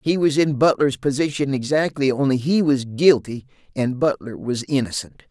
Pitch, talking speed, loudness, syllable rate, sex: 140 Hz, 160 wpm, -20 LUFS, 4.9 syllables/s, male